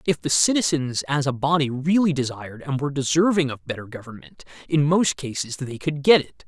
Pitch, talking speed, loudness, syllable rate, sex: 140 Hz, 195 wpm, -22 LUFS, 5.7 syllables/s, male